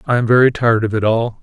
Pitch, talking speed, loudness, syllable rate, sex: 115 Hz, 295 wpm, -14 LUFS, 6.9 syllables/s, male